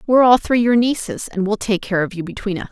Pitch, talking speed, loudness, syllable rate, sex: 215 Hz, 285 wpm, -18 LUFS, 6.2 syllables/s, female